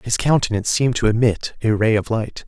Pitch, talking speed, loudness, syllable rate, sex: 115 Hz, 220 wpm, -19 LUFS, 6.0 syllables/s, male